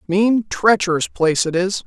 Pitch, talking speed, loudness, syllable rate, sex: 190 Hz, 160 wpm, -17 LUFS, 4.8 syllables/s, female